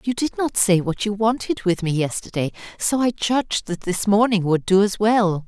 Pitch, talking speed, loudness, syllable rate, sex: 205 Hz, 220 wpm, -20 LUFS, 4.9 syllables/s, female